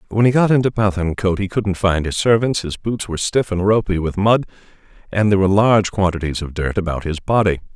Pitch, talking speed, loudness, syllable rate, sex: 100 Hz, 215 wpm, -18 LUFS, 6.2 syllables/s, male